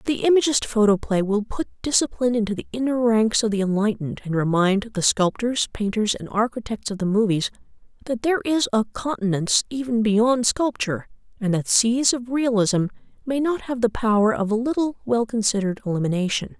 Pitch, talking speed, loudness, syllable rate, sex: 225 Hz, 170 wpm, -22 LUFS, 5.6 syllables/s, female